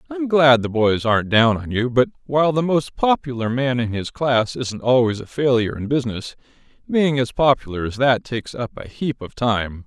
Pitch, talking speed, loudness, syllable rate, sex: 125 Hz, 205 wpm, -19 LUFS, 5.2 syllables/s, male